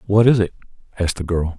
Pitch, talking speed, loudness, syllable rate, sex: 95 Hz, 225 wpm, -19 LUFS, 7.5 syllables/s, male